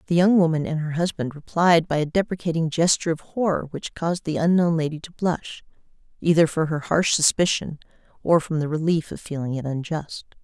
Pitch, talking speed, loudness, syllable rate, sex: 160 Hz, 190 wpm, -22 LUFS, 5.6 syllables/s, female